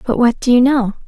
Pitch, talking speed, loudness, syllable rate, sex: 245 Hz, 280 wpm, -14 LUFS, 6.1 syllables/s, female